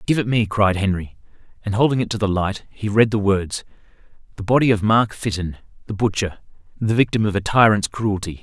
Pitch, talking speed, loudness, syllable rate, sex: 105 Hz, 200 wpm, -20 LUFS, 5.6 syllables/s, male